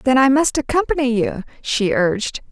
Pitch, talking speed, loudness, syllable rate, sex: 255 Hz, 165 wpm, -18 LUFS, 5.2 syllables/s, female